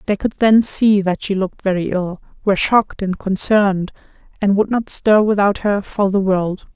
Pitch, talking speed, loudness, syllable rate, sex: 200 Hz, 195 wpm, -17 LUFS, 5.0 syllables/s, female